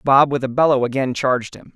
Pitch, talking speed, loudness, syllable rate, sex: 135 Hz, 240 wpm, -18 LUFS, 6.1 syllables/s, male